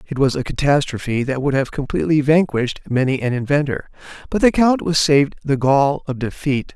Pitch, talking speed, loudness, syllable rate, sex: 140 Hz, 185 wpm, -18 LUFS, 5.7 syllables/s, male